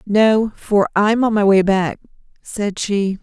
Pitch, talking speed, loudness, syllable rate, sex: 205 Hz, 165 wpm, -16 LUFS, 3.5 syllables/s, female